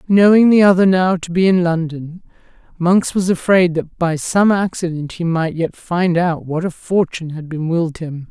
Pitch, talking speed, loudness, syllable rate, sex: 175 Hz, 195 wpm, -16 LUFS, 4.7 syllables/s, female